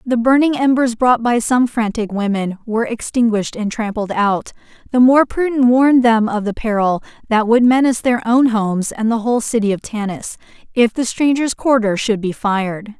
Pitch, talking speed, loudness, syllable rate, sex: 230 Hz, 185 wpm, -16 LUFS, 5.2 syllables/s, female